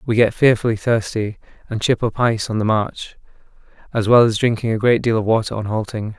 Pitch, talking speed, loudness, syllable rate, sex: 110 Hz, 215 wpm, -18 LUFS, 5.8 syllables/s, male